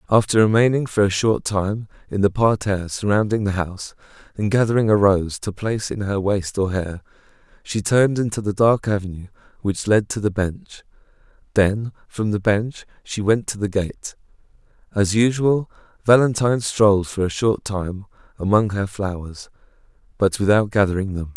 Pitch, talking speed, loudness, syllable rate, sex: 105 Hz, 165 wpm, -20 LUFS, 5.1 syllables/s, male